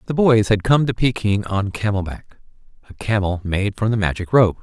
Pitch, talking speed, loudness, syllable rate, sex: 105 Hz, 205 wpm, -19 LUFS, 5.1 syllables/s, male